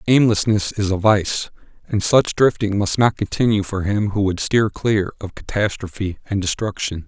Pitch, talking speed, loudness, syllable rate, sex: 105 Hz, 170 wpm, -19 LUFS, 4.7 syllables/s, male